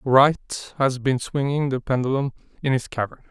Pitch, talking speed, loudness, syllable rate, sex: 135 Hz, 165 wpm, -23 LUFS, 4.7 syllables/s, male